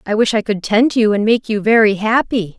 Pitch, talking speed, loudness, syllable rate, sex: 215 Hz, 255 wpm, -15 LUFS, 5.3 syllables/s, female